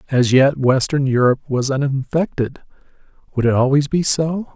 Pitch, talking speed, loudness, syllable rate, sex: 135 Hz, 145 wpm, -17 LUFS, 5.0 syllables/s, male